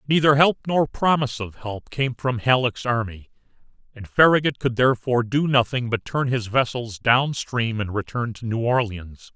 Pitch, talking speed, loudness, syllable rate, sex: 125 Hz, 175 wpm, -21 LUFS, 4.8 syllables/s, male